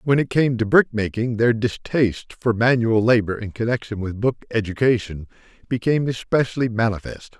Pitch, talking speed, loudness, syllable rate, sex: 115 Hz, 145 wpm, -21 LUFS, 5.3 syllables/s, male